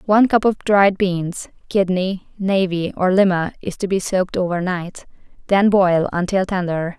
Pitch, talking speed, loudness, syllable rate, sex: 185 Hz, 165 wpm, -18 LUFS, 4.5 syllables/s, female